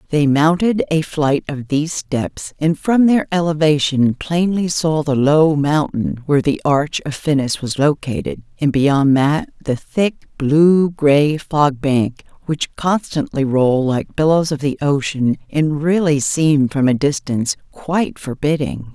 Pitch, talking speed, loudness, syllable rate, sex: 150 Hz, 150 wpm, -17 LUFS, 4.1 syllables/s, female